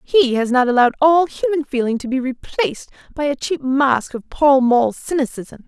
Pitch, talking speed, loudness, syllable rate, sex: 265 Hz, 190 wpm, -17 LUFS, 4.9 syllables/s, female